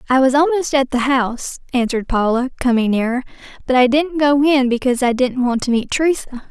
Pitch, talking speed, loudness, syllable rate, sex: 260 Hz, 205 wpm, -17 LUFS, 6.1 syllables/s, female